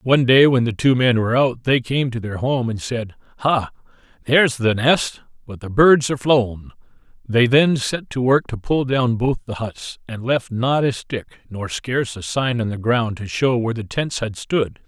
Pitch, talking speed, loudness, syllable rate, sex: 120 Hz, 220 wpm, -19 LUFS, 4.7 syllables/s, male